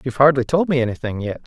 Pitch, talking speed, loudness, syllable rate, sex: 130 Hz, 245 wpm, -19 LUFS, 7.5 syllables/s, male